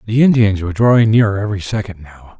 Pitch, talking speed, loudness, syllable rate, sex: 105 Hz, 200 wpm, -14 LUFS, 6.7 syllables/s, male